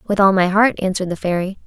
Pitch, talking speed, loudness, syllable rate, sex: 190 Hz, 250 wpm, -17 LUFS, 6.6 syllables/s, female